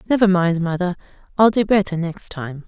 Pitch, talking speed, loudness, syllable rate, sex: 185 Hz, 180 wpm, -19 LUFS, 5.4 syllables/s, female